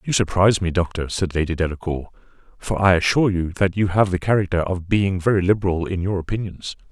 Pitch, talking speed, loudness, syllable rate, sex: 90 Hz, 200 wpm, -20 LUFS, 6.1 syllables/s, male